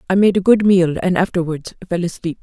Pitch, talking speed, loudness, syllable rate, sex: 180 Hz, 225 wpm, -16 LUFS, 5.7 syllables/s, female